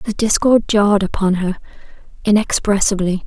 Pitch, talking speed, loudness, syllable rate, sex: 200 Hz, 110 wpm, -16 LUFS, 5.1 syllables/s, female